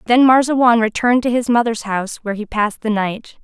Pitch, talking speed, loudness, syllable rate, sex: 230 Hz, 210 wpm, -16 LUFS, 6.3 syllables/s, female